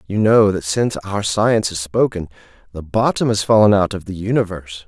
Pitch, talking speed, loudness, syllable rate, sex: 100 Hz, 195 wpm, -17 LUFS, 5.7 syllables/s, male